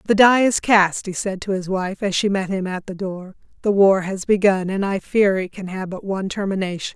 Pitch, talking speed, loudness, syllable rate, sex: 195 Hz, 250 wpm, -20 LUFS, 5.2 syllables/s, female